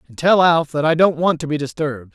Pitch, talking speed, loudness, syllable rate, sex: 155 Hz, 280 wpm, -17 LUFS, 6.0 syllables/s, male